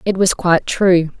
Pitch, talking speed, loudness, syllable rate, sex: 180 Hz, 200 wpm, -15 LUFS, 4.8 syllables/s, female